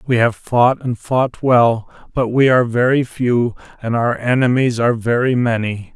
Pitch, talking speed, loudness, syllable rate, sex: 120 Hz, 170 wpm, -16 LUFS, 4.5 syllables/s, male